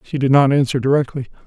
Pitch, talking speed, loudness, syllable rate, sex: 135 Hz, 205 wpm, -16 LUFS, 6.7 syllables/s, male